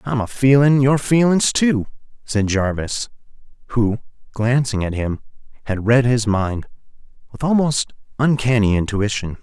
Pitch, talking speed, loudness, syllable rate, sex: 120 Hz, 120 wpm, -18 LUFS, 4.2 syllables/s, male